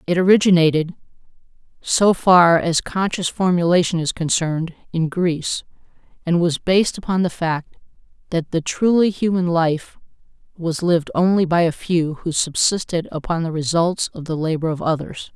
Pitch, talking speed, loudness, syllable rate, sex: 170 Hz, 150 wpm, -19 LUFS, 5.0 syllables/s, female